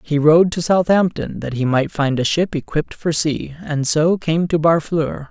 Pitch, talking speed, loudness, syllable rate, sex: 155 Hz, 205 wpm, -18 LUFS, 4.5 syllables/s, male